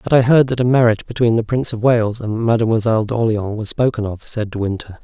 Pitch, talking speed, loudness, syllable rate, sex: 115 Hz, 240 wpm, -17 LUFS, 6.2 syllables/s, male